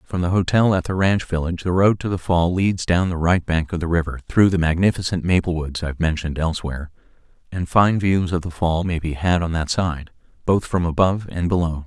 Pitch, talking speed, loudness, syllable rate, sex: 85 Hz, 235 wpm, -20 LUFS, 5.8 syllables/s, male